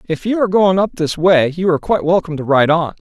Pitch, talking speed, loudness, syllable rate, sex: 170 Hz, 275 wpm, -15 LUFS, 6.9 syllables/s, male